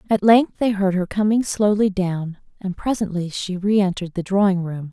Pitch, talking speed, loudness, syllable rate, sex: 195 Hz, 185 wpm, -20 LUFS, 4.9 syllables/s, female